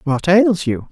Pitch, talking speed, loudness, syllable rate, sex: 170 Hz, 195 wpm, -15 LUFS, 3.7 syllables/s, male